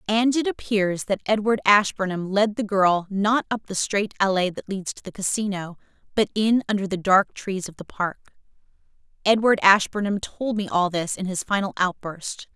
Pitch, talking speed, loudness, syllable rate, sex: 200 Hz, 180 wpm, -23 LUFS, 4.9 syllables/s, female